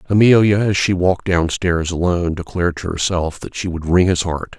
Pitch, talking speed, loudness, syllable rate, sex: 90 Hz, 195 wpm, -17 LUFS, 5.5 syllables/s, male